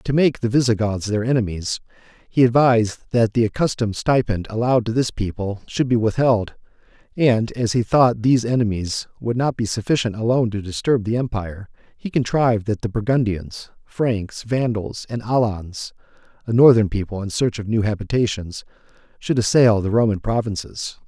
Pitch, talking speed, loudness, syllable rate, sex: 115 Hz, 160 wpm, -20 LUFS, 4.7 syllables/s, male